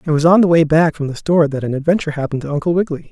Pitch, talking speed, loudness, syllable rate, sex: 155 Hz, 310 wpm, -15 LUFS, 8.4 syllables/s, male